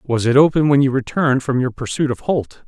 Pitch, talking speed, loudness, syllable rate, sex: 130 Hz, 245 wpm, -17 LUFS, 5.7 syllables/s, male